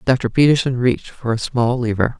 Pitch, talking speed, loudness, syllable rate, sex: 125 Hz, 190 wpm, -18 LUFS, 5.3 syllables/s, female